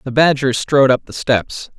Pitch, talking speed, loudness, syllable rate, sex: 130 Hz, 200 wpm, -15 LUFS, 5.1 syllables/s, male